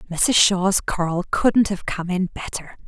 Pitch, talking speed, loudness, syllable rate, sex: 190 Hz, 165 wpm, -20 LUFS, 4.0 syllables/s, female